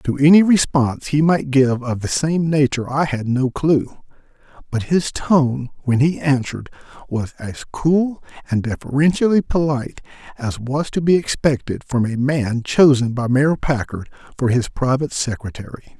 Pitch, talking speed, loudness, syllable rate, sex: 135 Hz, 160 wpm, -18 LUFS, 4.8 syllables/s, male